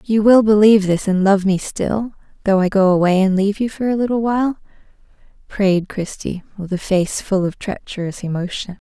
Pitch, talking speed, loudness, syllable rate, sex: 200 Hz, 190 wpm, -17 LUFS, 5.3 syllables/s, female